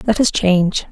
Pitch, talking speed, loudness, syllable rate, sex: 195 Hz, 200 wpm, -15 LUFS, 5.4 syllables/s, female